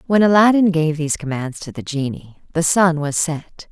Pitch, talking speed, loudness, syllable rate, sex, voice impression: 165 Hz, 195 wpm, -18 LUFS, 5.0 syllables/s, female, feminine, adult-like, tensed, powerful, slightly hard, clear, fluent, intellectual, calm, elegant, lively, slightly sharp